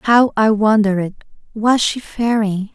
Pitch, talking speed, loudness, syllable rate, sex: 215 Hz, 130 wpm, -16 LUFS, 4.0 syllables/s, female